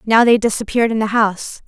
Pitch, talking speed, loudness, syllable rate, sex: 220 Hz, 215 wpm, -15 LUFS, 6.6 syllables/s, female